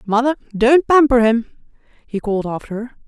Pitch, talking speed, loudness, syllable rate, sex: 240 Hz, 155 wpm, -16 LUFS, 5.1 syllables/s, female